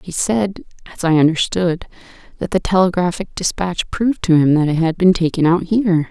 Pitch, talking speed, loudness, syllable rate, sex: 175 Hz, 165 wpm, -17 LUFS, 5.4 syllables/s, female